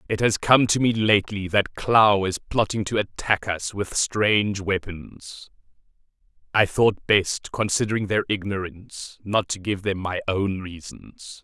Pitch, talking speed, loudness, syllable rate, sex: 100 Hz, 150 wpm, -22 LUFS, 4.2 syllables/s, male